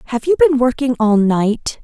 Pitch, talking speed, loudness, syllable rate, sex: 250 Hz, 195 wpm, -15 LUFS, 4.5 syllables/s, female